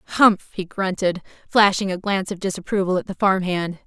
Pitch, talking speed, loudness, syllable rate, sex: 190 Hz, 185 wpm, -21 LUFS, 5.7 syllables/s, female